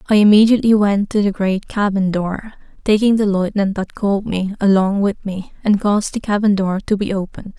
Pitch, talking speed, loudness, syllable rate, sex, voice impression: 200 Hz, 200 wpm, -17 LUFS, 5.7 syllables/s, female, feminine, adult-like, tensed, slightly bright, clear, fluent, intellectual, calm, reassuring, elegant, modest